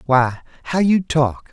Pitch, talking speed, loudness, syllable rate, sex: 150 Hz, 160 wpm, -18 LUFS, 3.9 syllables/s, male